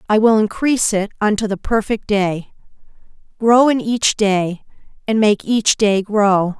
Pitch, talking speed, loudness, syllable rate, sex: 210 Hz, 155 wpm, -16 LUFS, 4.2 syllables/s, female